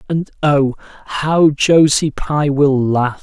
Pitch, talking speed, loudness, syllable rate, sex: 145 Hz, 130 wpm, -14 LUFS, 2.7 syllables/s, male